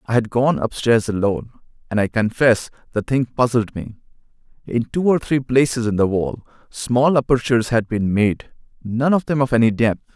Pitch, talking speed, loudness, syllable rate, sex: 120 Hz, 190 wpm, -19 LUFS, 5.1 syllables/s, male